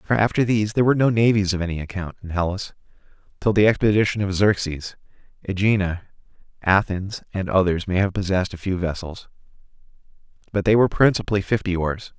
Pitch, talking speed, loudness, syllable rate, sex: 95 Hz, 165 wpm, -21 LUFS, 6.2 syllables/s, male